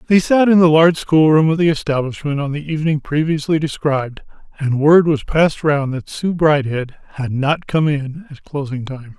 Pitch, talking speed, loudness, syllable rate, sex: 150 Hz, 195 wpm, -16 LUFS, 5.2 syllables/s, male